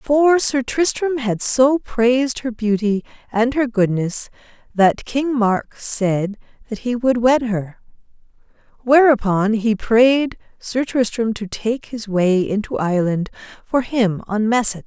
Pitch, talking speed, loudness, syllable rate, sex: 230 Hz, 140 wpm, -18 LUFS, 3.9 syllables/s, female